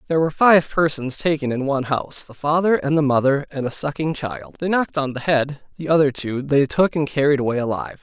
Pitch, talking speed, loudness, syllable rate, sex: 145 Hz, 230 wpm, -20 LUFS, 6.0 syllables/s, male